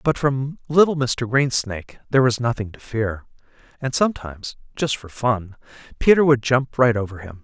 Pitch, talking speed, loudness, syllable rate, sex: 125 Hz, 170 wpm, -21 LUFS, 5.1 syllables/s, male